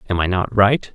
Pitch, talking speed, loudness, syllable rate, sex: 100 Hz, 255 wpm, -17 LUFS, 5.3 syllables/s, male